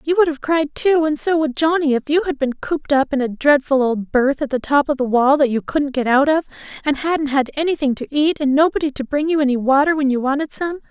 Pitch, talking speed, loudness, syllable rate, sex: 285 Hz, 270 wpm, -18 LUFS, 5.8 syllables/s, female